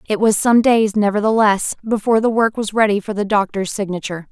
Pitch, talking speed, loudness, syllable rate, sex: 210 Hz, 195 wpm, -17 LUFS, 5.9 syllables/s, female